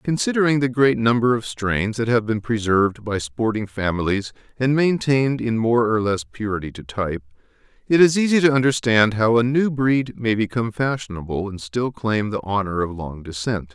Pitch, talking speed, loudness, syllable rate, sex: 115 Hz, 185 wpm, -20 LUFS, 5.2 syllables/s, male